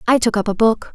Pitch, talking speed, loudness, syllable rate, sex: 225 Hz, 320 wpm, -17 LUFS, 6.3 syllables/s, female